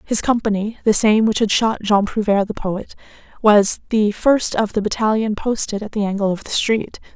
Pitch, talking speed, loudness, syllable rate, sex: 210 Hz, 200 wpm, -18 LUFS, 5.1 syllables/s, female